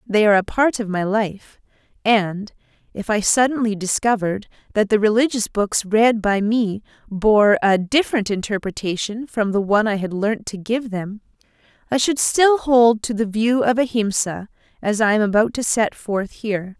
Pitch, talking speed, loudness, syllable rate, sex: 215 Hz, 175 wpm, -19 LUFS, 4.8 syllables/s, female